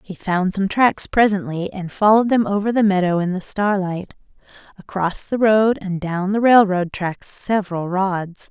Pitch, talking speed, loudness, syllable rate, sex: 195 Hz, 170 wpm, -18 LUFS, 4.5 syllables/s, female